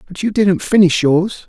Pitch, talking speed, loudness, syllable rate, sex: 185 Hz, 205 wpm, -14 LUFS, 4.7 syllables/s, male